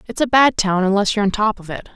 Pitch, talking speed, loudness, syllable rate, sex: 210 Hz, 305 wpm, -17 LUFS, 6.8 syllables/s, female